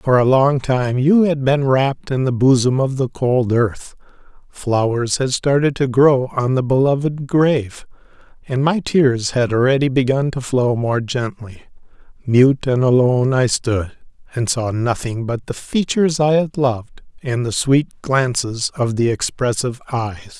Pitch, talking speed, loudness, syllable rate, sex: 130 Hz, 165 wpm, -17 LUFS, 4.3 syllables/s, male